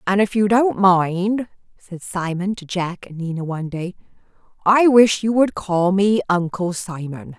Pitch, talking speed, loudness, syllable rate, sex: 190 Hz, 170 wpm, -19 LUFS, 4.2 syllables/s, female